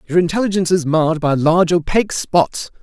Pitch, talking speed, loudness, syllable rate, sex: 170 Hz, 170 wpm, -16 LUFS, 6.1 syllables/s, male